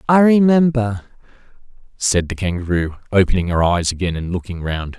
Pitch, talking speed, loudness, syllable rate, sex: 105 Hz, 145 wpm, -17 LUFS, 5.3 syllables/s, male